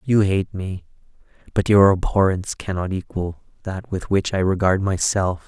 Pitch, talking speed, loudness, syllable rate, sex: 95 Hz, 155 wpm, -21 LUFS, 4.7 syllables/s, male